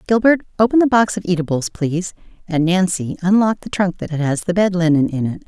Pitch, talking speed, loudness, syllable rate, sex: 185 Hz, 210 wpm, -17 LUFS, 5.6 syllables/s, female